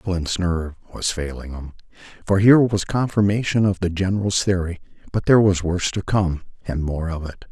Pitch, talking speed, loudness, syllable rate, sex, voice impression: 90 Hz, 185 wpm, -20 LUFS, 5.5 syllables/s, male, masculine, adult-like, tensed, powerful, slightly weak, muffled, cool, slightly intellectual, calm, mature, friendly, reassuring, wild, lively, kind